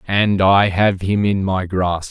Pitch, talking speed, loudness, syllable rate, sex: 95 Hz, 200 wpm, -16 LUFS, 3.5 syllables/s, male